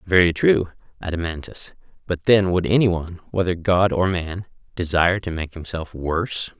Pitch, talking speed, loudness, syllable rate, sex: 90 Hz, 155 wpm, -21 LUFS, 5.1 syllables/s, male